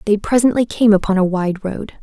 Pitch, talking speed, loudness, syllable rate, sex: 205 Hz, 210 wpm, -16 LUFS, 5.6 syllables/s, female